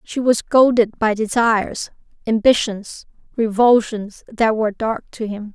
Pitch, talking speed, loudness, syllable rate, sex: 220 Hz, 130 wpm, -18 LUFS, 4.3 syllables/s, female